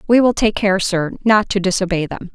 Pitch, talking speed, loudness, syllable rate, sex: 195 Hz, 230 wpm, -17 LUFS, 5.4 syllables/s, female